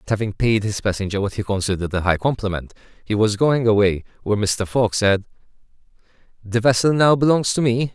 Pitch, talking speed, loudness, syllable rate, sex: 110 Hz, 190 wpm, -19 LUFS, 5.9 syllables/s, male